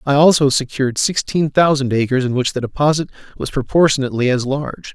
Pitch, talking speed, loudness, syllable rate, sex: 140 Hz, 170 wpm, -16 LUFS, 6.1 syllables/s, male